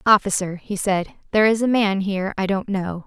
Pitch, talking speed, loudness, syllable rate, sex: 200 Hz, 215 wpm, -21 LUFS, 5.5 syllables/s, female